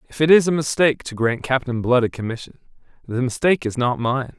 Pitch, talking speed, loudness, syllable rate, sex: 130 Hz, 220 wpm, -20 LUFS, 6.1 syllables/s, male